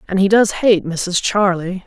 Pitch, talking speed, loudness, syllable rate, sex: 190 Hz, 195 wpm, -16 LUFS, 4.2 syllables/s, female